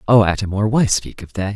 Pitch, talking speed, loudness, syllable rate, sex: 100 Hz, 270 wpm, -18 LUFS, 5.6 syllables/s, male